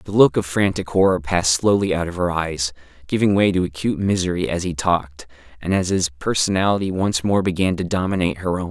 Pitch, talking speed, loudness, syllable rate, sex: 90 Hz, 205 wpm, -20 LUFS, 6.0 syllables/s, male